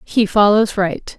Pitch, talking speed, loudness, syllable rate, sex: 205 Hz, 150 wpm, -15 LUFS, 3.7 syllables/s, female